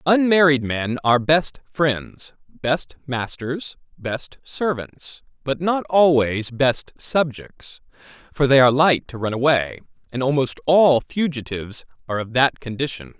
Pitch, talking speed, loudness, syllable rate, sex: 135 Hz, 130 wpm, -20 LUFS, 4.1 syllables/s, male